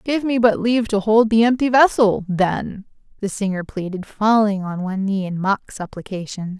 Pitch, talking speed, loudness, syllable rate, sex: 210 Hz, 180 wpm, -19 LUFS, 4.9 syllables/s, female